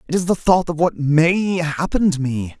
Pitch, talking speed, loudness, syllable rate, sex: 160 Hz, 230 wpm, -18 LUFS, 4.5 syllables/s, male